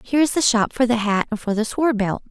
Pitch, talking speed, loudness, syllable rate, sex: 230 Hz, 310 wpm, -20 LUFS, 6.1 syllables/s, female